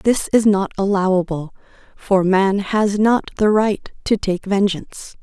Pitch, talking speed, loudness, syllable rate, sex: 200 Hz, 150 wpm, -18 LUFS, 4.1 syllables/s, female